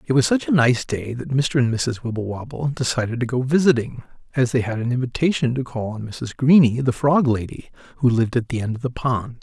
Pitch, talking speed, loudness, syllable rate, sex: 125 Hz, 230 wpm, -21 LUFS, 5.7 syllables/s, male